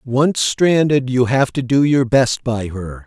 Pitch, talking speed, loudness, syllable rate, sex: 130 Hz, 195 wpm, -16 LUFS, 3.7 syllables/s, male